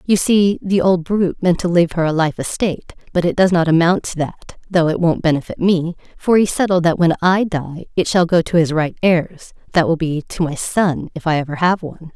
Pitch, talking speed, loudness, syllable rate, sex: 170 Hz, 235 wpm, -17 LUFS, 5.4 syllables/s, female